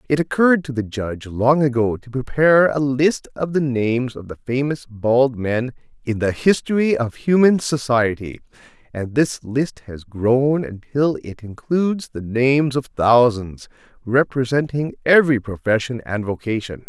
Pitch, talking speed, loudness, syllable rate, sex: 130 Hz, 150 wpm, -19 LUFS, 4.5 syllables/s, male